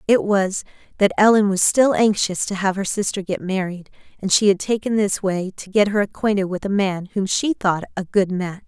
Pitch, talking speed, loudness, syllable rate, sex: 200 Hz, 220 wpm, -20 LUFS, 5.1 syllables/s, female